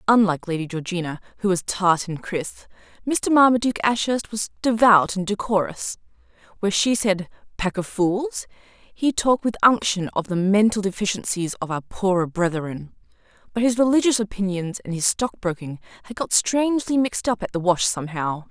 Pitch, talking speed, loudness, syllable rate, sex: 200 Hz, 160 wpm, -22 LUFS, 5.3 syllables/s, female